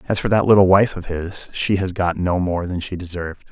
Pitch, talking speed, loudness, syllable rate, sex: 90 Hz, 255 wpm, -19 LUFS, 5.4 syllables/s, male